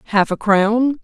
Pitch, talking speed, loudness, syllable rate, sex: 220 Hz, 175 wpm, -16 LUFS, 4.1 syllables/s, female